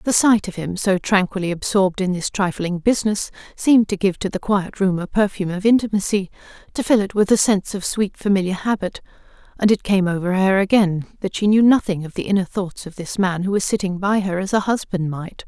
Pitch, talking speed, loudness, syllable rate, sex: 195 Hz, 225 wpm, -19 LUFS, 5.8 syllables/s, female